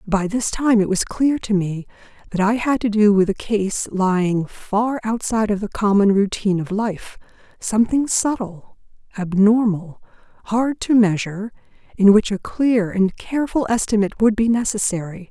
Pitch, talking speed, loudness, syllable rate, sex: 210 Hz, 160 wpm, -19 LUFS, 4.9 syllables/s, female